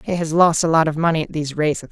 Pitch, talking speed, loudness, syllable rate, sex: 160 Hz, 315 wpm, -18 LUFS, 7.2 syllables/s, female